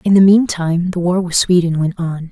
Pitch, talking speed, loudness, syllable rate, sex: 175 Hz, 260 wpm, -14 LUFS, 5.0 syllables/s, female